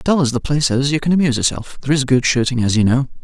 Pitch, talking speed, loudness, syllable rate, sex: 135 Hz, 295 wpm, -16 LUFS, 7.4 syllables/s, male